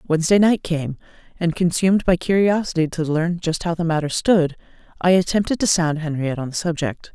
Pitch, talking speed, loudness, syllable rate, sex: 170 Hz, 185 wpm, -20 LUFS, 5.7 syllables/s, female